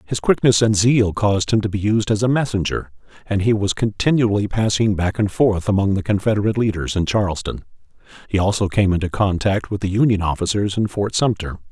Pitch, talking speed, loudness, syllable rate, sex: 105 Hz, 195 wpm, -19 LUFS, 5.8 syllables/s, male